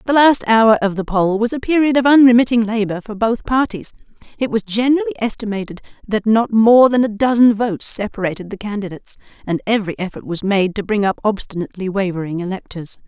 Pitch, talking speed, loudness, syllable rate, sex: 215 Hz, 185 wpm, -16 LUFS, 6.1 syllables/s, female